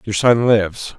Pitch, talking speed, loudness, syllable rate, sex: 110 Hz, 180 wpm, -16 LUFS, 4.5 syllables/s, male